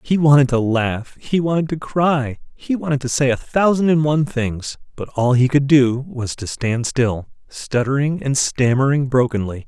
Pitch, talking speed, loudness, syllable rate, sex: 135 Hz, 185 wpm, -18 LUFS, 4.6 syllables/s, male